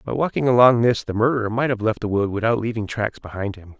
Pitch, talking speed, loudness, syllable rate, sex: 110 Hz, 255 wpm, -20 LUFS, 6.3 syllables/s, male